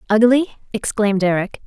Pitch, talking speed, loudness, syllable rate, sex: 220 Hz, 110 wpm, -18 LUFS, 5.9 syllables/s, female